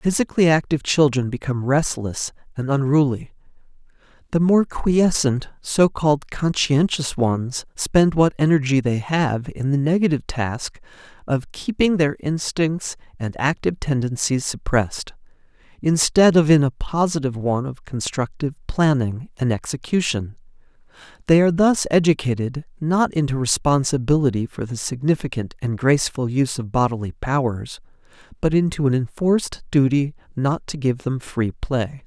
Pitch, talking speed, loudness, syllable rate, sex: 140 Hz, 125 wpm, -20 LUFS, 4.9 syllables/s, male